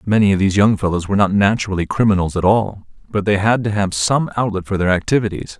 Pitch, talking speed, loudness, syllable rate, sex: 100 Hz, 225 wpm, -17 LUFS, 6.5 syllables/s, male